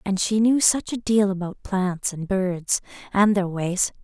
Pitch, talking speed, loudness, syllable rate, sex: 195 Hz, 195 wpm, -22 LUFS, 4.0 syllables/s, female